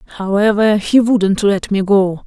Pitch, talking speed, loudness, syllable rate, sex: 205 Hz, 160 wpm, -14 LUFS, 3.6 syllables/s, female